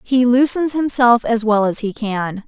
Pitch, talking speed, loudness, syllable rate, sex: 235 Hz, 195 wpm, -16 LUFS, 4.2 syllables/s, female